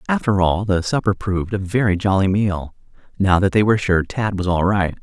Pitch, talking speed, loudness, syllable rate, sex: 95 Hz, 215 wpm, -19 LUFS, 5.5 syllables/s, male